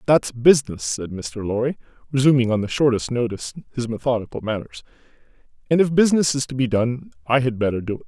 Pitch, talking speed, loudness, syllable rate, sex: 125 Hz, 185 wpm, -21 LUFS, 6.3 syllables/s, male